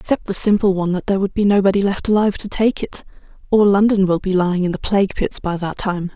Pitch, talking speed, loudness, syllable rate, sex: 195 Hz, 255 wpm, -17 LUFS, 6.6 syllables/s, female